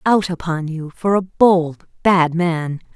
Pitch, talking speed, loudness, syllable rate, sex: 170 Hz, 160 wpm, -18 LUFS, 3.5 syllables/s, female